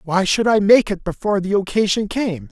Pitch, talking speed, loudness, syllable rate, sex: 195 Hz, 215 wpm, -17 LUFS, 5.4 syllables/s, male